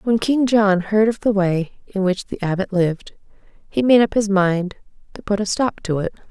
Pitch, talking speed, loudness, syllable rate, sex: 200 Hz, 220 wpm, -19 LUFS, 4.7 syllables/s, female